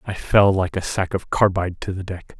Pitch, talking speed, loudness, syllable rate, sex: 95 Hz, 250 wpm, -20 LUFS, 5.3 syllables/s, male